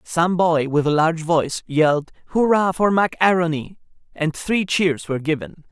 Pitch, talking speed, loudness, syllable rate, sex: 165 Hz, 170 wpm, -19 LUFS, 4.9 syllables/s, male